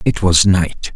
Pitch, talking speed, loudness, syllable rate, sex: 95 Hz, 190 wpm, -14 LUFS, 3.5 syllables/s, male